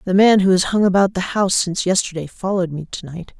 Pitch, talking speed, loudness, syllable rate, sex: 185 Hz, 245 wpm, -17 LUFS, 6.5 syllables/s, female